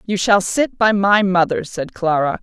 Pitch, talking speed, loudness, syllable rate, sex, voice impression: 190 Hz, 200 wpm, -17 LUFS, 4.4 syllables/s, female, slightly masculine, slightly adult-like, refreshing, sincere